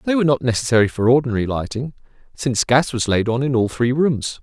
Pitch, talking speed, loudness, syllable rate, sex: 125 Hz, 215 wpm, -18 LUFS, 6.4 syllables/s, male